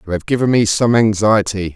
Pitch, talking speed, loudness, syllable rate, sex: 105 Hz, 205 wpm, -15 LUFS, 5.6 syllables/s, male